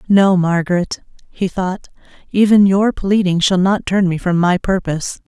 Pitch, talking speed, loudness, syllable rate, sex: 185 Hz, 160 wpm, -15 LUFS, 4.6 syllables/s, female